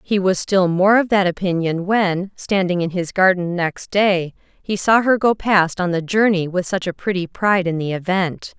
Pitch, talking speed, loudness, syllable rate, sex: 185 Hz, 210 wpm, -18 LUFS, 4.6 syllables/s, female